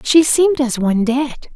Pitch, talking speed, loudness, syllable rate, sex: 270 Hz, 190 wpm, -15 LUFS, 5.0 syllables/s, female